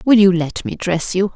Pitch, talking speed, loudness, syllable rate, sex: 185 Hz, 265 wpm, -17 LUFS, 4.8 syllables/s, female